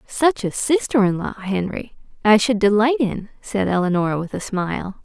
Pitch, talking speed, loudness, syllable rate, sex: 210 Hz, 180 wpm, -20 LUFS, 4.8 syllables/s, female